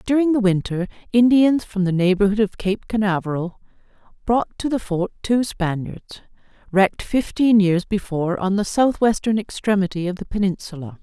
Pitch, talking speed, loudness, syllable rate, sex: 205 Hz, 145 wpm, -20 LUFS, 5.3 syllables/s, female